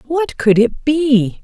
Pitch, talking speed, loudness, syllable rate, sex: 265 Hz, 170 wpm, -15 LUFS, 3.1 syllables/s, female